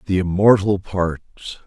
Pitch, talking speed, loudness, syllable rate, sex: 95 Hz, 110 wpm, -18 LUFS, 4.7 syllables/s, male